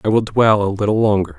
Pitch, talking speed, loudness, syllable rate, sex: 105 Hz, 260 wpm, -16 LUFS, 6.2 syllables/s, male